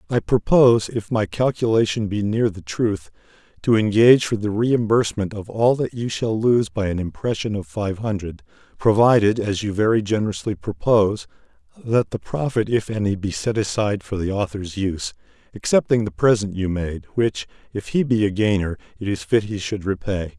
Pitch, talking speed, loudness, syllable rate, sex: 110 Hz, 180 wpm, -21 LUFS, 5.2 syllables/s, male